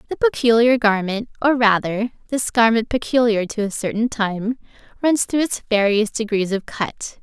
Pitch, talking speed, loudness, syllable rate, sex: 225 Hz, 160 wpm, -19 LUFS, 4.7 syllables/s, female